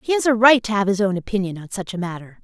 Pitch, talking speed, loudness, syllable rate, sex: 205 Hz, 320 wpm, -19 LUFS, 7.0 syllables/s, female